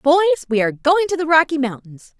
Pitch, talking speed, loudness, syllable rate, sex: 290 Hz, 220 wpm, -17 LUFS, 6.3 syllables/s, female